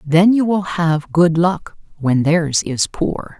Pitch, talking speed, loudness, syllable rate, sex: 165 Hz, 175 wpm, -16 LUFS, 3.3 syllables/s, female